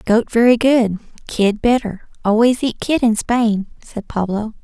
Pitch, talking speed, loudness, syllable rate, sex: 225 Hz, 155 wpm, -16 LUFS, 4.2 syllables/s, female